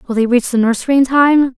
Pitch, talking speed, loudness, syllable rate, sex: 255 Hz, 265 wpm, -13 LUFS, 6.3 syllables/s, female